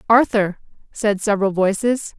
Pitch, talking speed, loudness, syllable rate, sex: 205 Hz, 110 wpm, -19 LUFS, 4.8 syllables/s, female